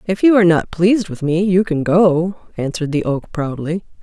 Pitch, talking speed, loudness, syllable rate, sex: 175 Hz, 210 wpm, -16 LUFS, 5.4 syllables/s, female